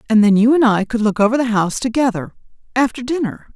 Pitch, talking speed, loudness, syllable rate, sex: 230 Hz, 200 wpm, -16 LUFS, 6.4 syllables/s, female